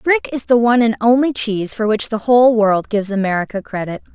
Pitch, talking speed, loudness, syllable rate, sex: 220 Hz, 215 wpm, -16 LUFS, 6.1 syllables/s, female